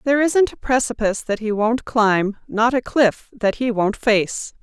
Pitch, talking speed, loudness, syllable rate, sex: 230 Hz, 195 wpm, -19 LUFS, 4.4 syllables/s, female